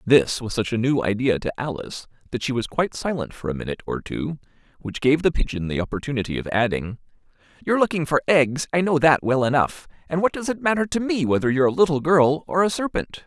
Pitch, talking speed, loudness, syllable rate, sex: 145 Hz, 225 wpm, -22 LUFS, 6.3 syllables/s, male